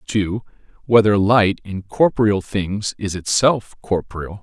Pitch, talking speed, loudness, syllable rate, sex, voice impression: 100 Hz, 120 wpm, -18 LUFS, 4.5 syllables/s, male, masculine, adult-like, thick, tensed, slightly powerful, clear, intellectual, calm, slightly friendly, reassuring, slightly wild, lively